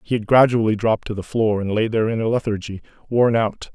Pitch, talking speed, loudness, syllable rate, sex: 110 Hz, 240 wpm, -19 LUFS, 6.3 syllables/s, male